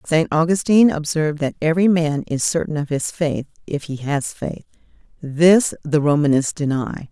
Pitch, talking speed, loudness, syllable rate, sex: 155 Hz, 160 wpm, -19 LUFS, 5.0 syllables/s, female